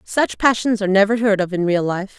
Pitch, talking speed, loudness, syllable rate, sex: 205 Hz, 245 wpm, -18 LUFS, 5.8 syllables/s, female